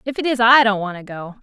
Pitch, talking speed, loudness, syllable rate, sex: 220 Hz, 335 wpm, -15 LUFS, 6.3 syllables/s, female